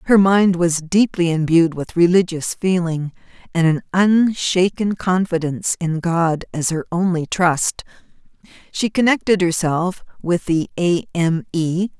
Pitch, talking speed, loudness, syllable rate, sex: 175 Hz, 130 wpm, -18 LUFS, 4.1 syllables/s, female